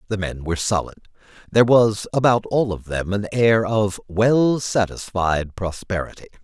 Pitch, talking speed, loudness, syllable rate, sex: 105 Hz, 150 wpm, -20 LUFS, 4.7 syllables/s, male